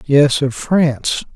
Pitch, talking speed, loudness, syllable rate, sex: 145 Hz, 135 wpm, -16 LUFS, 3.5 syllables/s, male